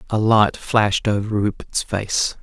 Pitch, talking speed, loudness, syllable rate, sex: 105 Hz, 150 wpm, -19 LUFS, 4.1 syllables/s, male